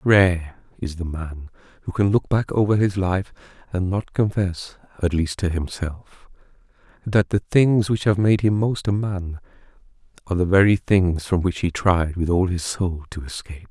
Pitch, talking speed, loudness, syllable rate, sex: 95 Hz, 185 wpm, -21 LUFS, 4.6 syllables/s, male